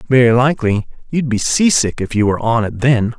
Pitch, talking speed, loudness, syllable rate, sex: 120 Hz, 205 wpm, -15 LUFS, 5.7 syllables/s, male